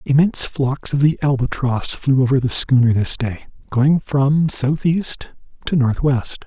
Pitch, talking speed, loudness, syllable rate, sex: 135 Hz, 150 wpm, -18 LUFS, 4.2 syllables/s, male